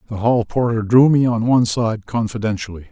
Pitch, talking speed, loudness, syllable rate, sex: 115 Hz, 185 wpm, -17 LUFS, 5.6 syllables/s, male